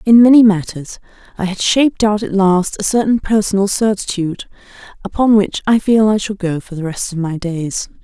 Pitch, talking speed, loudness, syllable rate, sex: 200 Hz, 195 wpm, -14 LUFS, 5.3 syllables/s, female